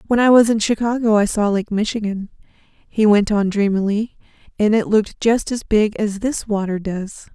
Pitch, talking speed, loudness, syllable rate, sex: 210 Hz, 190 wpm, -18 LUFS, 5.0 syllables/s, female